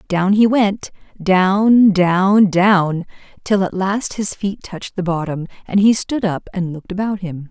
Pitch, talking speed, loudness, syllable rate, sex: 190 Hz, 175 wpm, -16 LUFS, 4.0 syllables/s, female